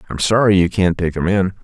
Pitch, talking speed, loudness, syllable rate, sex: 95 Hz, 255 wpm, -16 LUFS, 5.8 syllables/s, male